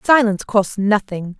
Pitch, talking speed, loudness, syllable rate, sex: 210 Hz, 130 wpm, -17 LUFS, 4.7 syllables/s, female